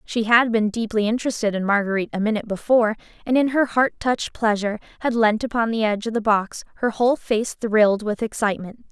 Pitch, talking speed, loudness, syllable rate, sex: 220 Hz, 200 wpm, -21 LUFS, 6.4 syllables/s, female